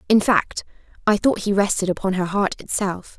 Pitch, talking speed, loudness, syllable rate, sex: 195 Hz, 190 wpm, -21 LUFS, 5.0 syllables/s, female